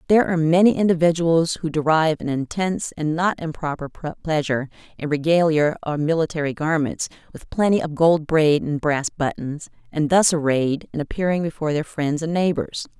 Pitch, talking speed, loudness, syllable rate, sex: 160 Hz, 160 wpm, -21 LUFS, 5.7 syllables/s, female